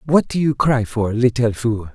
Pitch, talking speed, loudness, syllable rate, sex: 120 Hz, 215 wpm, -18 LUFS, 4.5 syllables/s, male